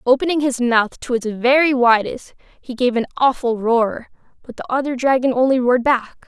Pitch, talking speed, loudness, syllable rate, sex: 250 Hz, 180 wpm, -17 LUFS, 5.1 syllables/s, female